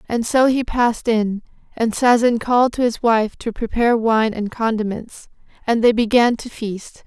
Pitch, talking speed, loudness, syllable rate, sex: 230 Hz, 180 wpm, -18 LUFS, 4.7 syllables/s, female